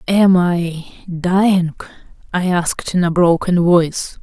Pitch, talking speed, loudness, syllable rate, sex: 175 Hz, 130 wpm, -16 LUFS, 4.1 syllables/s, female